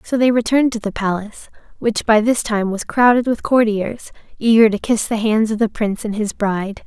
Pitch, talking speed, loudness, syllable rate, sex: 220 Hz, 220 wpm, -17 LUFS, 5.5 syllables/s, female